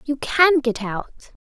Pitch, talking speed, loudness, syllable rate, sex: 265 Hz, 165 wpm, -19 LUFS, 3.8 syllables/s, female